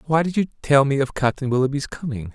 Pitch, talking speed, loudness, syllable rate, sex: 140 Hz, 230 wpm, -21 LUFS, 5.9 syllables/s, male